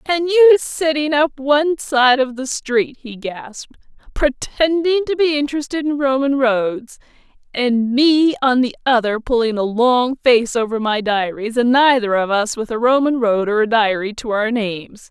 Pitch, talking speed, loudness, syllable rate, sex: 255 Hz, 175 wpm, -17 LUFS, 4.4 syllables/s, female